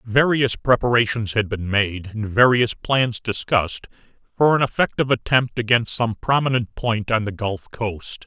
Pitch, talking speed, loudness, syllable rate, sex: 115 Hz, 150 wpm, -20 LUFS, 4.6 syllables/s, male